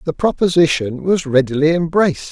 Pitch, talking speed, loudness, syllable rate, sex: 160 Hz, 130 wpm, -16 LUFS, 5.0 syllables/s, male